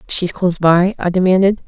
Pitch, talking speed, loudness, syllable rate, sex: 180 Hz, 180 wpm, -14 LUFS, 5.5 syllables/s, female